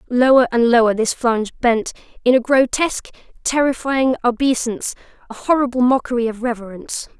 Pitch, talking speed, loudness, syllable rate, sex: 245 Hz, 125 wpm, -17 LUFS, 5.7 syllables/s, female